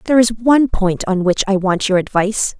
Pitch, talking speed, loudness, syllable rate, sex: 210 Hz, 230 wpm, -15 LUFS, 5.9 syllables/s, female